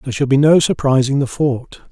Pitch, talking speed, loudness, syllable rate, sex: 135 Hz, 220 wpm, -15 LUFS, 5.8 syllables/s, male